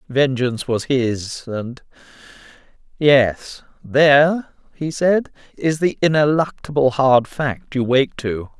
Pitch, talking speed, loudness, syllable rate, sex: 135 Hz, 110 wpm, -18 LUFS, 3.6 syllables/s, male